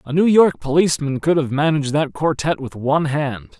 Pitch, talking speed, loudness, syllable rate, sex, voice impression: 150 Hz, 200 wpm, -18 LUFS, 5.6 syllables/s, male, masculine, adult-like, slightly powerful, unique, slightly intense